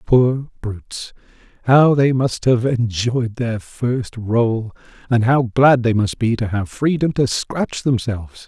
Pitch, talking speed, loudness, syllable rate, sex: 120 Hz, 155 wpm, -18 LUFS, 3.7 syllables/s, male